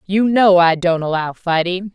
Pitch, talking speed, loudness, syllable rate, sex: 180 Hz, 185 wpm, -15 LUFS, 4.3 syllables/s, female